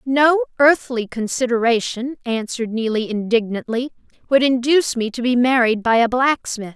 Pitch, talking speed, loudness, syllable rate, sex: 245 Hz, 135 wpm, -18 LUFS, 4.9 syllables/s, female